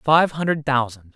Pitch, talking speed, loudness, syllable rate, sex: 140 Hz, 155 wpm, -20 LUFS, 4.5 syllables/s, male